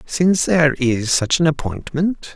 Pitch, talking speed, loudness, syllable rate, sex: 150 Hz, 155 wpm, -18 LUFS, 4.5 syllables/s, male